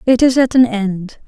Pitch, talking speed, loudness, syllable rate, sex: 230 Hz, 235 wpm, -14 LUFS, 4.5 syllables/s, female